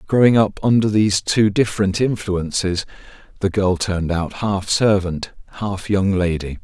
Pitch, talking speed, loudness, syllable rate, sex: 100 Hz, 145 wpm, -19 LUFS, 4.6 syllables/s, male